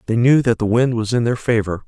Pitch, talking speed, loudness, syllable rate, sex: 115 Hz, 290 wpm, -17 LUFS, 6.0 syllables/s, male